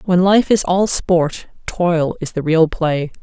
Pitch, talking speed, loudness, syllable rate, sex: 170 Hz, 185 wpm, -16 LUFS, 3.5 syllables/s, female